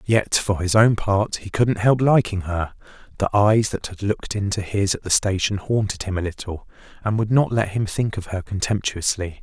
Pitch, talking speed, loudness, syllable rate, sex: 100 Hz, 210 wpm, -21 LUFS, 5.0 syllables/s, male